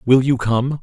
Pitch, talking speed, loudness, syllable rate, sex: 130 Hz, 220 wpm, -17 LUFS, 4.2 syllables/s, male